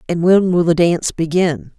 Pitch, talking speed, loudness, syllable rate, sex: 170 Hz, 200 wpm, -15 LUFS, 5.1 syllables/s, female